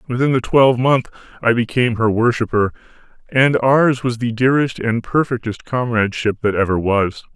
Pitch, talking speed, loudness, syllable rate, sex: 120 Hz, 145 wpm, -17 LUFS, 5.3 syllables/s, male